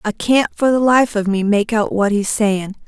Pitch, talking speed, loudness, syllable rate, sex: 215 Hz, 250 wpm, -16 LUFS, 4.5 syllables/s, female